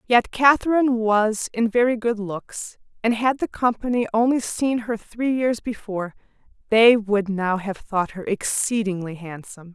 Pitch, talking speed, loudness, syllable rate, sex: 220 Hz, 155 wpm, -21 LUFS, 4.5 syllables/s, female